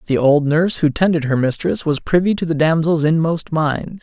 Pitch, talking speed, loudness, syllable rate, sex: 160 Hz, 210 wpm, -17 LUFS, 5.2 syllables/s, male